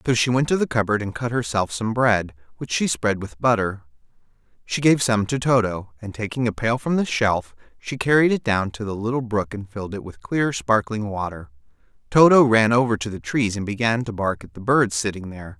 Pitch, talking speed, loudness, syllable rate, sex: 110 Hz, 225 wpm, -21 LUFS, 5.4 syllables/s, male